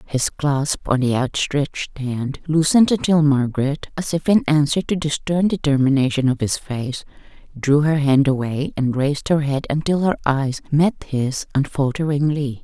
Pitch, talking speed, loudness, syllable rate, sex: 145 Hz, 160 wpm, -19 LUFS, 4.7 syllables/s, female